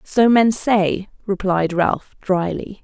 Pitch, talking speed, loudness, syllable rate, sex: 195 Hz, 125 wpm, -18 LUFS, 3.2 syllables/s, female